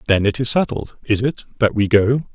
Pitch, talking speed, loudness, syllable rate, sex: 115 Hz, 230 wpm, -18 LUFS, 5.2 syllables/s, male